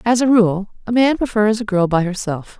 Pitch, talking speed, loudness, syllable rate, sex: 210 Hz, 230 wpm, -17 LUFS, 5.2 syllables/s, female